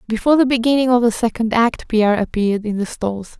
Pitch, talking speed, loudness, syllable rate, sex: 230 Hz, 210 wpm, -17 LUFS, 6.2 syllables/s, female